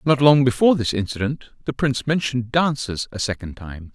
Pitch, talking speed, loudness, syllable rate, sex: 125 Hz, 180 wpm, -20 LUFS, 5.9 syllables/s, male